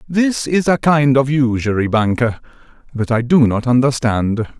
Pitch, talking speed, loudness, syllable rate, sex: 130 Hz, 155 wpm, -15 LUFS, 4.4 syllables/s, male